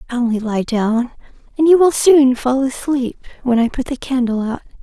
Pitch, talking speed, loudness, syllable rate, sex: 255 Hz, 185 wpm, -16 LUFS, 4.9 syllables/s, female